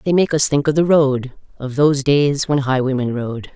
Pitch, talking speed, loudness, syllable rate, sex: 140 Hz, 220 wpm, -17 LUFS, 5.0 syllables/s, female